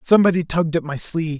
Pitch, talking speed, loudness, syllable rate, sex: 165 Hz, 215 wpm, -19 LUFS, 7.5 syllables/s, male